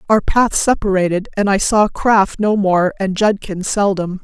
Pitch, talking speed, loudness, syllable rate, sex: 200 Hz, 170 wpm, -15 LUFS, 4.3 syllables/s, female